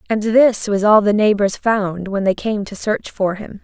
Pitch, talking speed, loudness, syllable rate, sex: 205 Hz, 230 wpm, -17 LUFS, 4.4 syllables/s, female